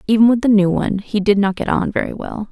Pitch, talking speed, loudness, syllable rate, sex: 210 Hz, 285 wpm, -16 LUFS, 6.4 syllables/s, female